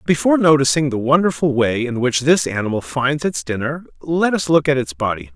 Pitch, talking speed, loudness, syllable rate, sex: 135 Hz, 200 wpm, -17 LUFS, 5.5 syllables/s, male